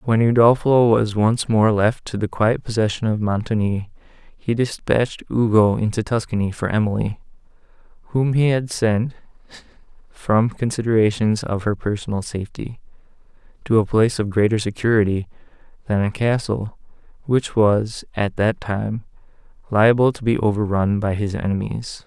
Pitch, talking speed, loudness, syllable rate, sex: 110 Hz, 135 wpm, -20 LUFS, 4.9 syllables/s, male